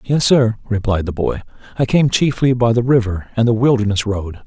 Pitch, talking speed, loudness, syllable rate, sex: 115 Hz, 200 wpm, -16 LUFS, 5.3 syllables/s, male